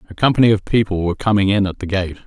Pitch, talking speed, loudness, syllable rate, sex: 100 Hz, 265 wpm, -17 LUFS, 7.6 syllables/s, male